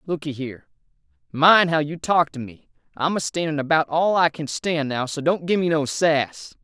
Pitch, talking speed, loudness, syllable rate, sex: 155 Hz, 200 wpm, -21 LUFS, 4.9 syllables/s, male